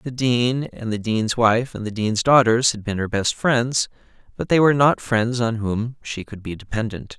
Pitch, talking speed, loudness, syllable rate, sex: 115 Hz, 215 wpm, -20 LUFS, 4.5 syllables/s, male